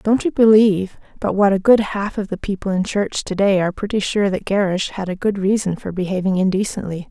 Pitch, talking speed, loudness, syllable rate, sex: 195 Hz, 230 wpm, -18 LUFS, 5.7 syllables/s, female